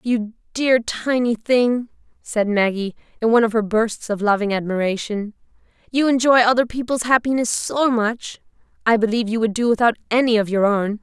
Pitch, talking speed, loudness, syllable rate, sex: 225 Hz, 170 wpm, -19 LUFS, 5.2 syllables/s, female